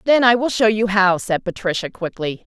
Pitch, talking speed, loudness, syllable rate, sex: 205 Hz, 210 wpm, -18 LUFS, 5.1 syllables/s, female